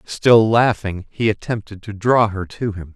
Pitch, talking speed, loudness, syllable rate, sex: 105 Hz, 185 wpm, -18 LUFS, 4.3 syllables/s, male